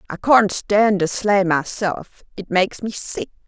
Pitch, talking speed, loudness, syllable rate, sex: 195 Hz, 170 wpm, -19 LUFS, 4.1 syllables/s, female